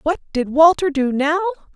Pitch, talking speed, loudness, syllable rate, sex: 310 Hz, 170 wpm, -17 LUFS, 5.1 syllables/s, female